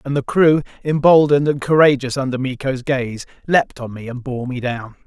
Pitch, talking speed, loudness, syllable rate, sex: 135 Hz, 190 wpm, -17 LUFS, 5.4 syllables/s, male